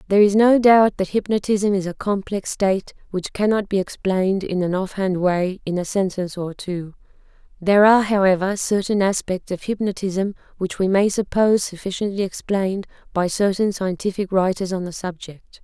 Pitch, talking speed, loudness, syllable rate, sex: 195 Hz, 165 wpm, -20 LUFS, 5.3 syllables/s, female